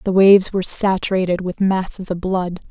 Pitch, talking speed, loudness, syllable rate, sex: 185 Hz, 175 wpm, -18 LUFS, 5.6 syllables/s, female